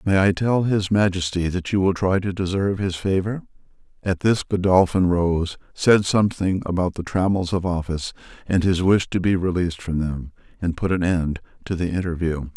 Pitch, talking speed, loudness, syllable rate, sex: 90 Hz, 185 wpm, -21 LUFS, 5.2 syllables/s, male